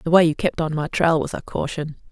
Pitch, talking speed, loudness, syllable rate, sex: 160 Hz, 285 wpm, -21 LUFS, 5.9 syllables/s, female